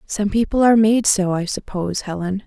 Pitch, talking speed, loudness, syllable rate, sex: 200 Hz, 195 wpm, -18 LUFS, 5.6 syllables/s, female